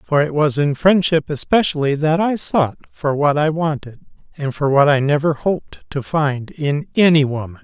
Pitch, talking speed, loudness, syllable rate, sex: 150 Hz, 190 wpm, -17 LUFS, 4.8 syllables/s, male